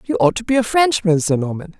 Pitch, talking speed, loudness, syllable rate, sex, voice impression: 280 Hz, 265 wpm, -17 LUFS, 6.1 syllables/s, female, feminine, slightly adult-like, slightly muffled, slightly raspy, slightly refreshing, friendly, slightly kind